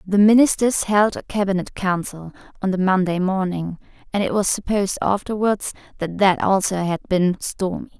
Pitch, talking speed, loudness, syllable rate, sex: 195 Hz, 160 wpm, -20 LUFS, 5.0 syllables/s, female